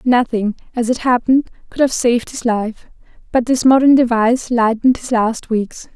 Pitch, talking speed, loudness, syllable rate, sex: 240 Hz, 170 wpm, -16 LUFS, 5.2 syllables/s, female